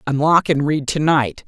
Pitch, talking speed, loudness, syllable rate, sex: 150 Hz, 205 wpm, -17 LUFS, 4.5 syllables/s, female